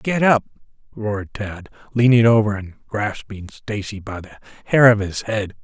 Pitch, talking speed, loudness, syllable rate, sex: 105 Hz, 160 wpm, -19 LUFS, 4.7 syllables/s, male